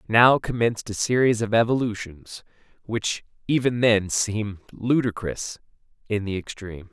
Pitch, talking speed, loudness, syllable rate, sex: 110 Hz, 120 wpm, -23 LUFS, 4.7 syllables/s, male